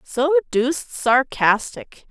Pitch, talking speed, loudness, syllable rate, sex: 240 Hz, 85 wpm, -19 LUFS, 3.2 syllables/s, female